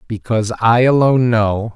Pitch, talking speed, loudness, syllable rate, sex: 115 Hz, 135 wpm, -14 LUFS, 5.0 syllables/s, male